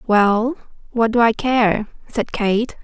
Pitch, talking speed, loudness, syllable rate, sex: 225 Hz, 150 wpm, -18 LUFS, 3.4 syllables/s, female